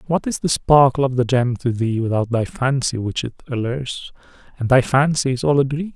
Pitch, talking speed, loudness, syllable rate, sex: 130 Hz, 220 wpm, -19 LUFS, 5.4 syllables/s, male